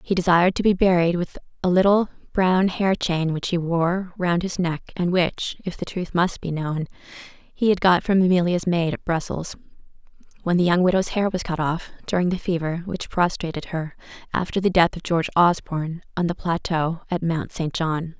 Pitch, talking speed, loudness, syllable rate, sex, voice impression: 175 Hz, 200 wpm, -22 LUFS, 5.1 syllables/s, female, feminine, slightly adult-like, slightly cute, calm, friendly, slightly sweet